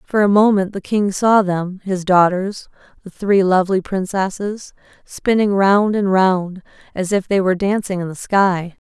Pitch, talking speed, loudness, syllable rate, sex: 195 Hz, 170 wpm, -17 LUFS, 4.4 syllables/s, female